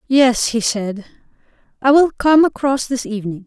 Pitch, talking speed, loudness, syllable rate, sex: 245 Hz, 155 wpm, -16 LUFS, 4.9 syllables/s, female